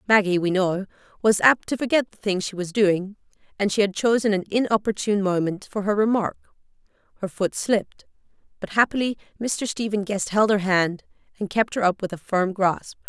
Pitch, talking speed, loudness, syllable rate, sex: 200 Hz, 190 wpm, -23 LUFS, 5.4 syllables/s, female